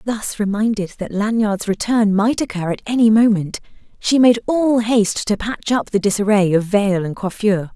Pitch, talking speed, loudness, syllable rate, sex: 210 Hz, 180 wpm, -17 LUFS, 4.9 syllables/s, female